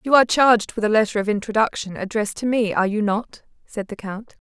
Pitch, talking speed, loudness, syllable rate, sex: 215 Hz, 230 wpm, -20 LUFS, 6.4 syllables/s, female